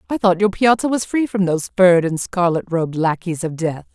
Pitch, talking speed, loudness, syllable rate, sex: 185 Hz, 230 wpm, -18 LUFS, 5.8 syllables/s, female